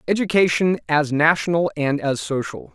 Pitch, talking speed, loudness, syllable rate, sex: 155 Hz, 130 wpm, -20 LUFS, 4.9 syllables/s, male